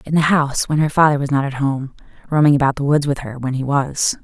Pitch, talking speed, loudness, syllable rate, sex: 140 Hz, 270 wpm, -17 LUFS, 6.0 syllables/s, female